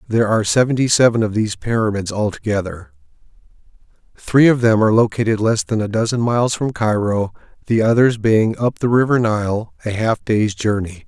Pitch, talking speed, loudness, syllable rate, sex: 110 Hz, 170 wpm, -17 LUFS, 5.5 syllables/s, male